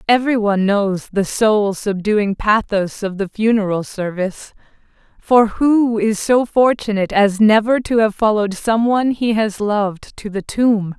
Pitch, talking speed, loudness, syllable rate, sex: 210 Hz, 160 wpm, -16 LUFS, 4.5 syllables/s, female